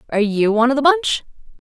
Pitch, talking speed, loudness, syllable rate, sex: 240 Hz, 215 wpm, -17 LUFS, 7.9 syllables/s, female